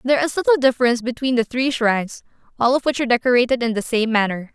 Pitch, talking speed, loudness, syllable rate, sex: 245 Hz, 225 wpm, -19 LUFS, 7.1 syllables/s, female